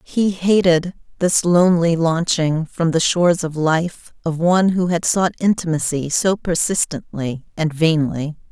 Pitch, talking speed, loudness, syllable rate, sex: 170 Hz, 140 wpm, -18 LUFS, 4.3 syllables/s, female